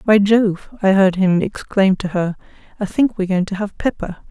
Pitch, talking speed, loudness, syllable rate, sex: 195 Hz, 210 wpm, -17 LUFS, 5.0 syllables/s, female